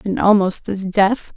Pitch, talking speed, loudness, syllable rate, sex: 200 Hz, 175 wpm, -17 LUFS, 4.0 syllables/s, female